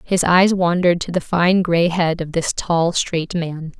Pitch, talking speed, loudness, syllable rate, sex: 170 Hz, 205 wpm, -18 LUFS, 4.1 syllables/s, female